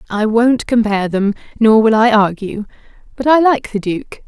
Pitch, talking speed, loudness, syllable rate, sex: 225 Hz, 180 wpm, -14 LUFS, 4.9 syllables/s, female